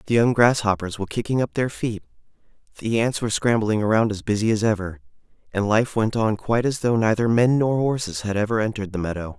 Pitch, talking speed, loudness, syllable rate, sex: 110 Hz, 210 wpm, -22 LUFS, 6.2 syllables/s, male